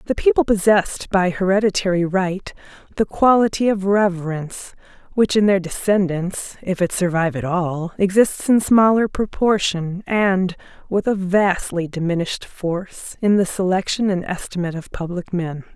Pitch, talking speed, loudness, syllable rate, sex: 190 Hz, 140 wpm, -19 LUFS, 4.8 syllables/s, female